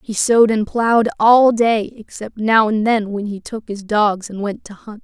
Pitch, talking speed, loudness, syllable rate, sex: 215 Hz, 225 wpm, -16 LUFS, 4.6 syllables/s, female